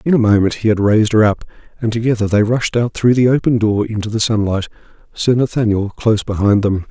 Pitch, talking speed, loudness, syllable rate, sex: 110 Hz, 215 wpm, -15 LUFS, 6.0 syllables/s, male